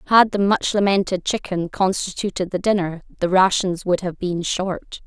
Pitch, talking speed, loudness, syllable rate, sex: 185 Hz, 165 wpm, -20 LUFS, 4.7 syllables/s, female